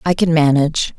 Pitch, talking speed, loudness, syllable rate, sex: 155 Hz, 185 wpm, -15 LUFS, 5.8 syllables/s, female